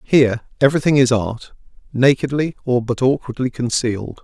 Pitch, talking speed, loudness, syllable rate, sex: 125 Hz, 140 wpm, -18 LUFS, 5.5 syllables/s, male